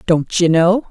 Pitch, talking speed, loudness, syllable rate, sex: 180 Hz, 200 wpm, -14 LUFS, 4.0 syllables/s, female